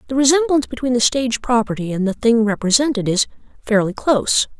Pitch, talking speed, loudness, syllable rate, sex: 240 Hz, 170 wpm, -17 LUFS, 6.3 syllables/s, female